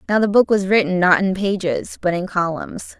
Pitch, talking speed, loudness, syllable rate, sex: 190 Hz, 220 wpm, -18 LUFS, 5.0 syllables/s, female